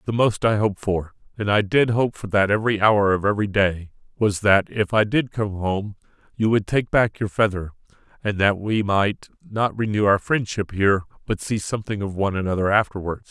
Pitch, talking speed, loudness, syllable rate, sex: 105 Hz, 190 wpm, -21 LUFS, 5.4 syllables/s, male